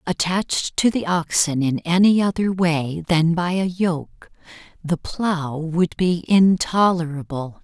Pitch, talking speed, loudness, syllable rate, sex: 170 Hz, 135 wpm, -20 LUFS, 3.8 syllables/s, female